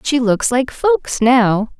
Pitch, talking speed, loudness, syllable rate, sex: 255 Hz, 170 wpm, -15 LUFS, 3.0 syllables/s, female